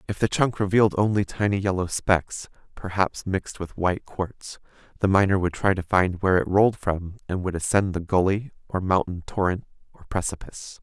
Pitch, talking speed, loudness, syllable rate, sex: 95 Hz, 185 wpm, -24 LUFS, 5.5 syllables/s, male